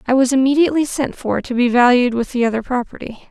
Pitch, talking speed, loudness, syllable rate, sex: 250 Hz, 220 wpm, -16 LUFS, 6.4 syllables/s, female